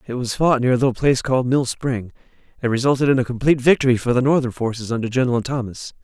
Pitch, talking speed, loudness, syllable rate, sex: 125 Hz, 230 wpm, -19 LUFS, 7.1 syllables/s, male